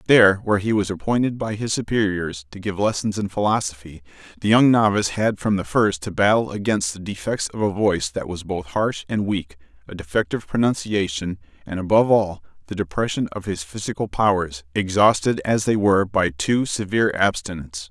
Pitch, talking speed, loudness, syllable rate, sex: 100 Hz, 180 wpm, -21 LUFS, 5.6 syllables/s, male